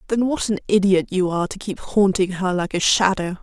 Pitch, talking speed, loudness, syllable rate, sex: 190 Hz, 230 wpm, -20 LUFS, 5.5 syllables/s, female